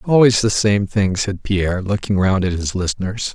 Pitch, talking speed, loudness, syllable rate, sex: 100 Hz, 195 wpm, -18 LUFS, 4.9 syllables/s, male